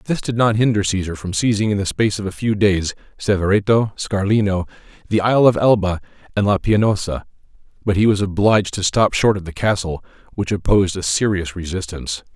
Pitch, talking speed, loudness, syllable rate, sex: 100 Hz, 185 wpm, -18 LUFS, 5.8 syllables/s, male